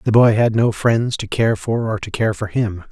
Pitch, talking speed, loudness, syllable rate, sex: 110 Hz, 270 wpm, -18 LUFS, 4.7 syllables/s, male